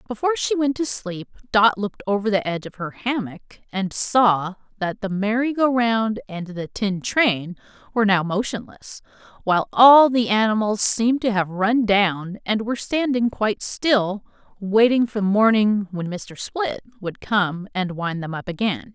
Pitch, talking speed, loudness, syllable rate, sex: 210 Hz, 170 wpm, -21 LUFS, 4.4 syllables/s, female